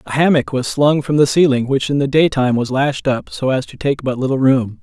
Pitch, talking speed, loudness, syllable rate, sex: 135 Hz, 260 wpm, -16 LUFS, 5.5 syllables/s, male